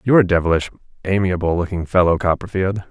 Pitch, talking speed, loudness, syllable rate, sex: 90 Hz, 145 wpm, -18 LUFS, 6.5 syllables/s, male